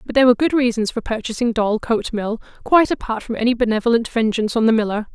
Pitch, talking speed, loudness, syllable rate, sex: 230 Hz, 210 wpm, -18 LUFS, 7.1 syllables/s, female